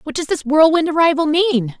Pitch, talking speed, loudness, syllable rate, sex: 305 Hz, 200 wpm, -15 LUFS, 5.3 syllables/s, female